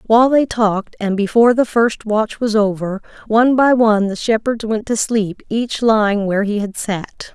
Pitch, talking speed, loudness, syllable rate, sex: 220 Hz, 195 wpm, -16 LUFS, 5.0 syllables/s, female